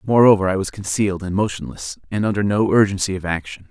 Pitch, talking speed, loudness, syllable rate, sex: 95 Hz, 195 wpm, -19 LUFS, 6.3 syllables/s, male